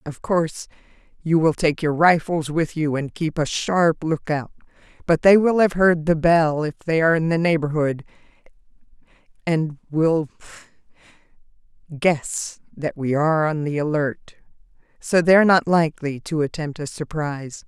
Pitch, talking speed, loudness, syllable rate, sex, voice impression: 160 Hz, 155 wpm, -20 LUFS, 4.8 syllables/s, female, feminine, adult-like, tensed, powerful, slightly hard, clear, halting, lively, slightly strict, intense, sharp